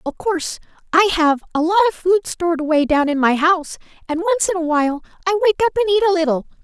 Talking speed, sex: 235 wpm, female